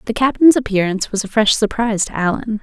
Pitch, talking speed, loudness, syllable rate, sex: 220 Hz, 205 wpm, -16 LUFS, 6.5 syllables/s, female